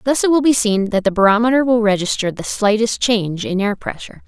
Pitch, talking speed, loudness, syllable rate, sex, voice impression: 215 Hz, 225 wpm, -16 LUFS, 6.0 syllables/s, female, feminine, slightly gender-neutral, young, slightly adult-like, thin, tensed, slightly powerful, bright, hard, clear, fluent, cute, very intellectual, slightly refreshing, very sincere, slightly calm, friendly, slightly reassuring, very unique, slightly elegant, slightly sweet, slightly strict, slightly sharp